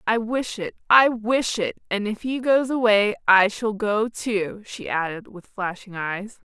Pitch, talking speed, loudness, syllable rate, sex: 215 Hz, 185 wpm, -22 LUFS, 4.0 syllables/s, female